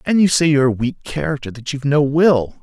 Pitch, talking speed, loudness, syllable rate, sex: 145 Hz, 250 wpm, -17 LUFS, 6.0 syllables/s, male